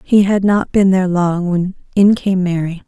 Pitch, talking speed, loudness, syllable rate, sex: 185 Hz, 210 wpm, -15 LUFS, 4.7 syllables/s, female